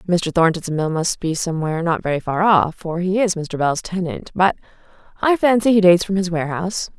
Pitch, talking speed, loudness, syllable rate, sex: 175 Hz, 205 wpm, -19 LUFS, 5.8 syllables/s, female